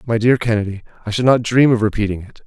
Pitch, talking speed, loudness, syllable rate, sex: 110 Hz, 245 wpm, -16 LUFS, 6.7 syllables/s, male